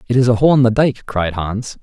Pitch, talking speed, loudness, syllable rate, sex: 115 Hz, 295 wpm, -15 LUFS, 5.6 syllables/s, male